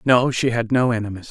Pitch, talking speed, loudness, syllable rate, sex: 120 Hz, 230 wpm, -19 LUFS, 5.8 syllables/s, male